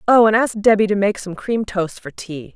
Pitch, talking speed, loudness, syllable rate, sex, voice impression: 205 Hz, 260 wpm, -17 LUFS, 5.1 syllables/s, female, feminine, very adult-like, intellectual, slightly calm, elegant